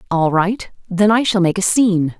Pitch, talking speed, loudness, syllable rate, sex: 190 Hz, 220 wpm, -15 LUFS, 5.0 syllables/s, female